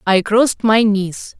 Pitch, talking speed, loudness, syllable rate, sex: 210 Hz, 175 wpm, -15 LUFS, 3.9 syllables/s, female